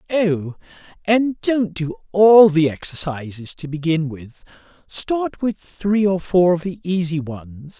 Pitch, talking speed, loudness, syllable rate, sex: 180 Hz, 145 wpm, -19 LUFS, 3.7 syllables/s, male